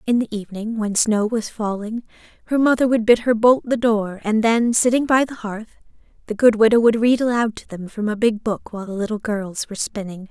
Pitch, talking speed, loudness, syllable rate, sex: 220 Hz, 225 wpm, -19 LUFS, 5.5 syllables/s, female